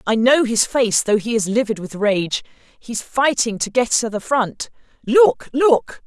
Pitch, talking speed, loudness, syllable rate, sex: 230 Hz, 180 wpm, -18 LUFS, 4.3 syllables/s, female